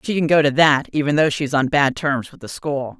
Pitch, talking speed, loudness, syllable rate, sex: 145 Hz, 300 wpm, -18 LUFS, 5.5 syllables/s, female